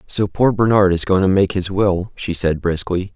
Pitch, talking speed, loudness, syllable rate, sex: 95 Hz, 230 wpm, -17 LUFS, 4.7 syllables/s, male